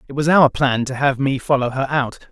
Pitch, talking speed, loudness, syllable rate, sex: 135 Hz, 260 wpm, -18 LUFS, 5.5 syllables/s, male